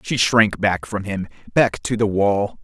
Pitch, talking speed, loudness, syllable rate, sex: 105 Hz, 205 wpm, -19 LUFS, 4.0 syllables/s, male